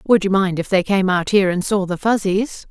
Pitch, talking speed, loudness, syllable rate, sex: 195 Hz, 265 wpm, -18 LUFS, 5.4 syllables/s, female